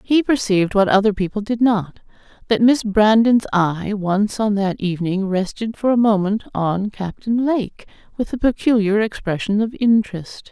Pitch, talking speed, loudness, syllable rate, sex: 210 Hz, 160 wpm, -18 LUFS, 4.7 syllables/s, female